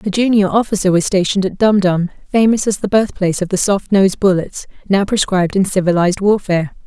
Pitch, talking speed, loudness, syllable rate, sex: 195 Hz, 190 wpm, -15 LUFS, 6.1 syllables/s, female